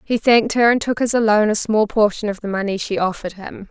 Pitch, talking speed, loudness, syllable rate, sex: 215 Hz, 275 wpm, -17 LUFS, 6.1 syllables/s, female